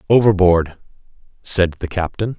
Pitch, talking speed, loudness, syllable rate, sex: 95 Hz, 100 wpm, -17 LUFS, 4.6 syllables/s, male